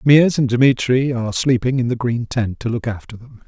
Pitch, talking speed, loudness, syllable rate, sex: 120 Hz, 225 wpm, -18 LUFS, 5.5 syllables/s, male